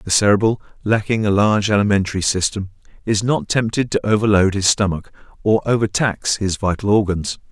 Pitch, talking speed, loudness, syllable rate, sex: 105 Hz, 150 wpm, -18 LUFS, 5.6 syllables/s, male